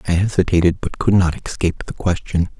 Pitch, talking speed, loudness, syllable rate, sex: 90 Hz, 185 wpm, -19 LUFS, 6.2 syllables/s, male